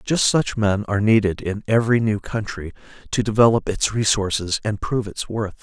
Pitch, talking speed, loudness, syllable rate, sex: 105 Hz, 180 wpm, -20 LUFS, 5.4 syllables/s, male